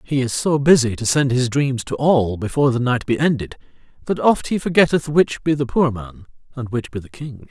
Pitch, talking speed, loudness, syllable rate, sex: 135 Hz, 230 wpm, -18 LUFS, 5.3 syllables/s, male